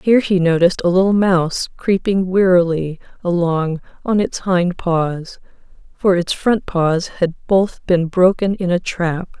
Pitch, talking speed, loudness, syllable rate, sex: 180 Hz, 155 wpm, -17 LUFS, 4.2 syllables/s, female